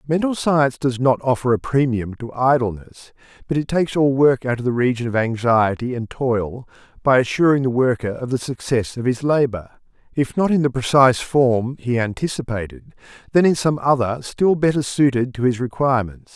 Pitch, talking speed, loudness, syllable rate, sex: 130 Hz, 185 wpm, -19 LUFS, 5.3 syllables/s, male